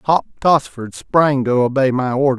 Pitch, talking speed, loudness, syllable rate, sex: 135 Hz, 175 wpm, -16 LUFS, 4.4 syllables/s, male